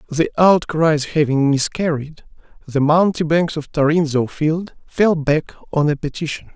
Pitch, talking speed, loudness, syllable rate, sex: 155 Hz, 130 wpm, -18 LUFS, 4.3 syllables/s, male